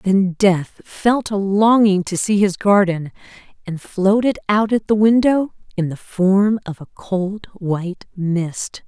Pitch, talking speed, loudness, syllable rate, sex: 195 Hz, 155 wpm, -18 LUFS, 3.6 syllables/s, female